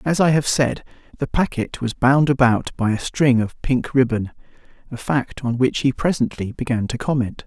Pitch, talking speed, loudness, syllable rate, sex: 130 Hz, 185 wpm, -20 LUFS, 4.9 syllables/s, male